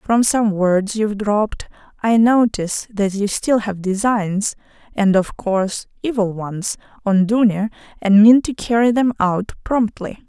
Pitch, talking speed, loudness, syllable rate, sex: 210 Hz, 140 wpm, -18 LUFS, 4.2 syllables/s, female